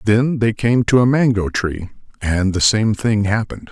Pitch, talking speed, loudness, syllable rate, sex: 110 Hz, 195 wpm, -17 LUFS, 4.6 syllables/s, male